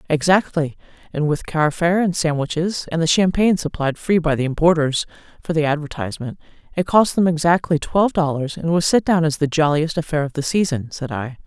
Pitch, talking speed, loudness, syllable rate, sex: 160 Hz, 195 wpm, -19 LUFS, 5.7 syllables/s, female